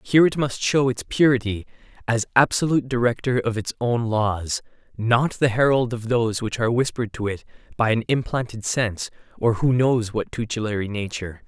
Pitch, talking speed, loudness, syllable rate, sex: 115 Hz, 175 wpm, -22 LUFS, 5.5 syllables/s, male